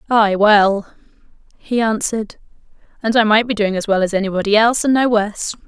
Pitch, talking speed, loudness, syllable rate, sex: 215 Hz, 180 wpm, -16 LUFS, 5.8 syllables/s, female